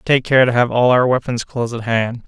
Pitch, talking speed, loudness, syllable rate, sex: 120 Hz, 265 wpm, -16 LUFS, 5.6 syllables/s, male